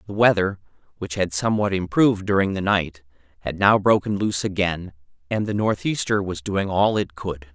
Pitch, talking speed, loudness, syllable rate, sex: 95 Hz, 185 wpm, -22 LUFS, 5.3 syllables/s, male